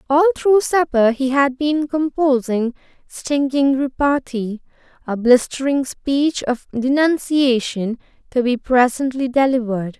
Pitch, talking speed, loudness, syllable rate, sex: 270 Hz, 110 wpm, -18 LUFS, 4.0 syllables/s, female